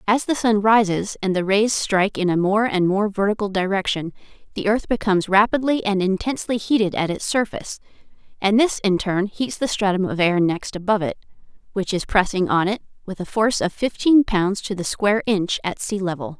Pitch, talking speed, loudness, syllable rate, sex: 200 Hz, 200 wpm, -20 LUFS, 5.5 syllables/s, female